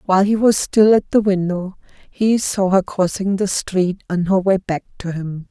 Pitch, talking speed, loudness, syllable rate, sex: 190 Hz, 205 wpm, -18 LUFS, 4.5 syllables/s, female